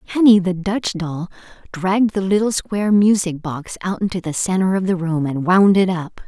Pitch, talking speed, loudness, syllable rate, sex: 185 Hz, 200 wpm, -18 LUFS, 5.1 syllables/s, female